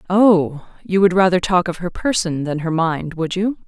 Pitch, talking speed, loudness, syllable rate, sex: 180 Hz, 210 wpm, -18 LUFS, 4.6 syllables/s, female